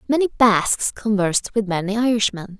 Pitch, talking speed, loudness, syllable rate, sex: 215 Hz, 140 wpm, -19 LUFS, 5.4 syllables/s, female